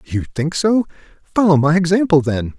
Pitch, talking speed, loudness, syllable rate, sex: 165 Hz, 140 wpm, -16 LUFS, 5.3 syllables/s, male